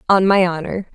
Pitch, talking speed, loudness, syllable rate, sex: 185 Hz, 190 wpm, -17 LUFS, 5.6 syllables/s, female